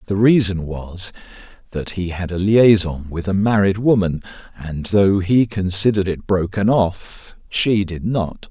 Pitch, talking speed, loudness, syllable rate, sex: 95 Hz, 155 wpm, -18 LUFS, 4.2 syllables/s, male